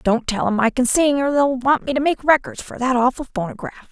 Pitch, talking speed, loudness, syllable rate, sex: 255 Hz, 260 wpm, -19 LUFS, 5.9 syllables/s, female